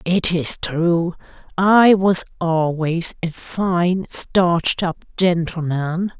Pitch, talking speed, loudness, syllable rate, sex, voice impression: 175 Hz, 105 wpm, -18 LUFS, 2.9 syllables/s, female, feminine, slightly old, slightly muffled, calm, slightly unique, kind